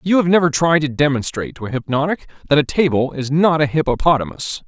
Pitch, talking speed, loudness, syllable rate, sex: 150 Hz, 205 wpm, -17 LUFS, 6.2 syllables/s, male